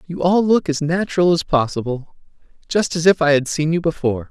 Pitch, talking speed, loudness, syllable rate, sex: 160 Hz, 195 wpm, -18 LUFS, 5.7 syllables/s, male